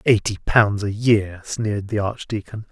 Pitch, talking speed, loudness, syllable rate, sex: 105 Hz, 155 wpm, -21 LUFS, 4.4 syllables/s, male